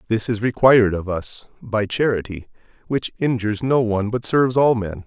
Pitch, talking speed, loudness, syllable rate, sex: 110 Hz, 180 wpm, -19 LUFS, 5.4 syllables/s, male